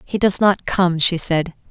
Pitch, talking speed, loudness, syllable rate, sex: 180 Hz, 210 wpm, -17 LUFS, 4.0 syllables/s, female